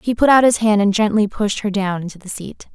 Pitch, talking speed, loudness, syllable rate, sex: 210 Hz, 285 wpm, -16 LUFS, 5.7 syllables/s, female